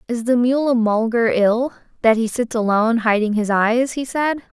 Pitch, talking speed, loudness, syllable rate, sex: 235 Hz, 185 wpm, -18 LUFS, 4.8 syllables/s, female